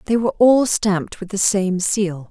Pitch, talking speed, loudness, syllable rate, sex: 200 Hz, 210 wpm, -18 LUFS, 4.7 syllables/s, female